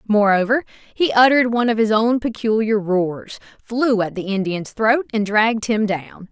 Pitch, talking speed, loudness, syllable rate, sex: 220 Hz, 170 wpm, -18 LUFS, 4.8 syllables/s, female